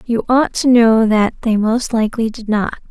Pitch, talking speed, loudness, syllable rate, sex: 225 Hz, 205 wpm, -15 LUFS, 4.8 syllables/s, female